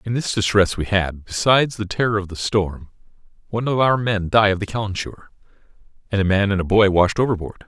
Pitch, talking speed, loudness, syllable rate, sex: 100 Hz, 210 wpm, -19 LUFS, 6.1 syllables/s, male